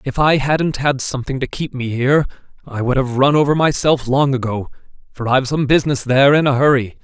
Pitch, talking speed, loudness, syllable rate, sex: 135 Hz, 215 wpm, -16 LUFS, 5.9 syllables/s, male